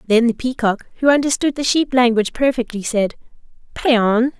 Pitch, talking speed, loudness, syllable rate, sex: 245 Hz, 150 wpm, -17 LUFS, 5.1 syllables/s, female